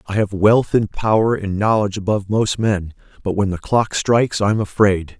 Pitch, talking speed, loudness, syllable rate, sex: 100 Hz, 210 wpm, -18 LUFS, 5.2 syllables/s, male